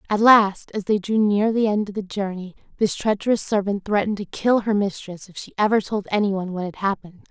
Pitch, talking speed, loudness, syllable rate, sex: 205 Hz, 220 wpm, -21 LUFS, 5.7 syllables/s, female